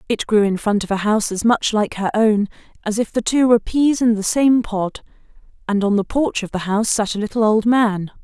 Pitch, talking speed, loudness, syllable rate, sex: 215 Hz, 250 wpm, -18 LUFS, 5.5 syllables/s, female